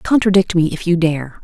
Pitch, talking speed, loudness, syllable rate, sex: 175 Hz, 210 wpm, -15 LUFS, 5.0 syllables/s, female